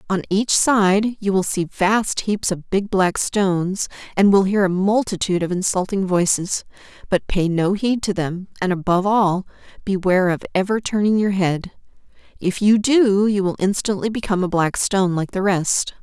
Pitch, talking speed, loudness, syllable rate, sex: 195 Hz, 180 wpm, -19 LUFS, 4.8 syllables/s, female